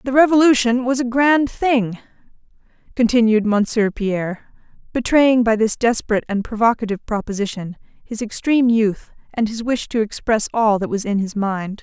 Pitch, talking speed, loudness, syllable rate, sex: 230 Hz, 150 wpm, -18 LUFS, 5.2 syllables/s, female